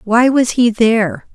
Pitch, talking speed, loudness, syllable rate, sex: 225 Hz, 180 wpm, -13 LUFS, 4.2 syllables/s, female